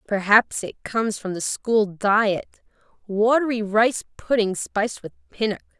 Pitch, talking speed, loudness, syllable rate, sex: 215 Hz, 125 wpm, -22 LUFS, 4.4 syllables/s, female